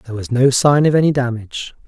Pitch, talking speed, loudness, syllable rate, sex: 130 Hz, 225 wpm, -15 LUFS, 6.8 syllables/s, male